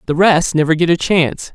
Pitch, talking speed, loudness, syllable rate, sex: 165 Hz, 235 wpm, -14 LUFS, 5.8 syllables/s, male